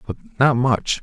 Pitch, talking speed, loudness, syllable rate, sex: 130 Hz, 175 wpm, -18 LUFS, 4.6 syllables/s, male